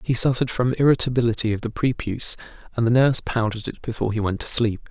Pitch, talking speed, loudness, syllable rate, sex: 115 Hz, 210 wpm, -21 LUFS, 7.0 syllables/s, male